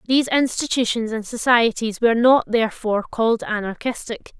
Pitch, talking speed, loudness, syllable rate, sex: 230 Hz, 125 wpm, -20 LUFS, 5.6 syllables/s, female